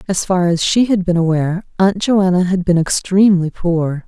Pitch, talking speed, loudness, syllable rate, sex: 180 Hz, 190 wpm, -15 LUFS, 5.0 syllables/s, female